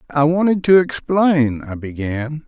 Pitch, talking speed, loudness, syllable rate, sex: 150 Hz, 145 wpm, -17 LUFS, 4.0 syllables/s, male